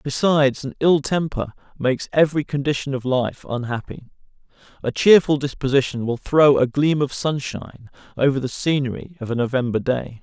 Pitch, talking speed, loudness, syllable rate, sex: 135 Hz, 155 wpm, -20 LUFS, 5.4 syllables/s, male